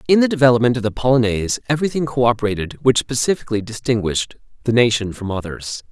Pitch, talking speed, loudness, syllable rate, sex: 120 Hz, 160 wpm, -18 LUFS, 7.0 syllables/s, male